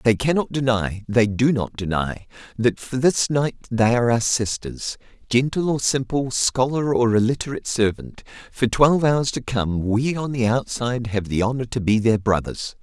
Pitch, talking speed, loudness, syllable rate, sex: 120 Hz, 165 wpm, -21 LUFS, 4.8 syllables/s, male